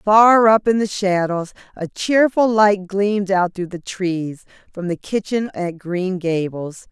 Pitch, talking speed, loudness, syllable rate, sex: 195 Hz, 165 wpm, -18 LUFS, 3.8 syllables/s, female